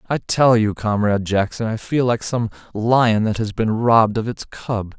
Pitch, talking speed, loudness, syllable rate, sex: 110 Hz, 205 wpm, -19 LUFS, 4.6 syllables/s, male